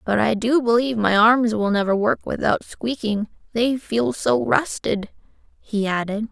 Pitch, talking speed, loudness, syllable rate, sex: 220 Hz, 160 wpm, -20 LUFS, 4.4 syllables/s, female